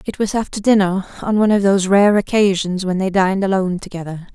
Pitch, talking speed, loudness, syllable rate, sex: 195 Hz, 205 wpm, -16 LUFS, 6.4 syllables/s, female